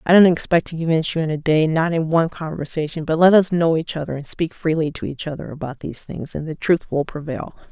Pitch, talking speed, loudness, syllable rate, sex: 160 Hz, 250 wpm, -20 LUFS, 6.2 syllables/s, female